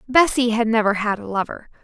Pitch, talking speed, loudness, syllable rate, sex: 225 Hz, 195 wpm, -20 LUFS, 5.7 syllables/s, female